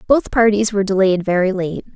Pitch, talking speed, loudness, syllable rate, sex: 200 Hz, 185 wpm, -16 LUFS, 5.9 syllables/s, female